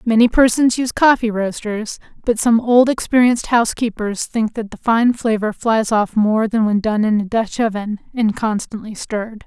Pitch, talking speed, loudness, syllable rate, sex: 225 Hz, 170 wpm, -17 LUFS, 4.9 syllables/s, female